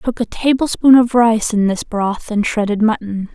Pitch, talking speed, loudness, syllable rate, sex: 220 Hz, 195 wpm, -15 LUFS, 4.9 syllables/s, female